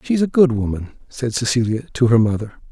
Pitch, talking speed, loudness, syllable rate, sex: 125 Hz, 200 wpm, -18 LUFS, 5.9 syllables/s, male